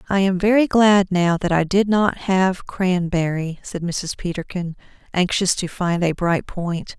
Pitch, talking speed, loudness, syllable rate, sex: 185 Hz, 170 wpm, -20 LUFS, 4.1 syllables/s, female